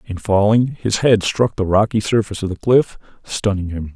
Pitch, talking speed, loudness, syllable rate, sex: 105 Hz, 195 wpm, -17 LUFS, 5.1 syllables/s, male